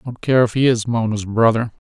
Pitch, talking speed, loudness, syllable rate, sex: 115 Hz, 260 wpm, -17 LUFS, 6.0 syllables/s, male